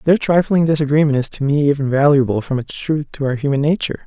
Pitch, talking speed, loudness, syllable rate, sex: 145 Hz, 220 wpm, -17 LUFS, 6.5 syllables/s, male